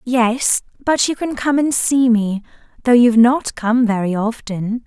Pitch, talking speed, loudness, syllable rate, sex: 240 Hz, 175 wpm, -16 LUFS, 4.2 syllables/s, female